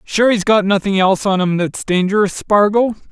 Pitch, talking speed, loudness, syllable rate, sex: 200 Hz, 190 wpm, -15 LUFS, 5.2 syllables/s, male